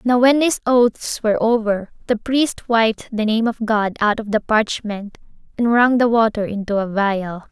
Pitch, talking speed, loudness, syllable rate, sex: 220 Hz, 190 wpm, -18 LUFS, 4.5 syllables/s, female